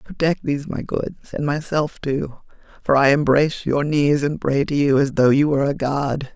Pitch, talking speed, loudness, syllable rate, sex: 145 Hz, 210 wpm, -20 LUFS, 5.2 syllables/s, female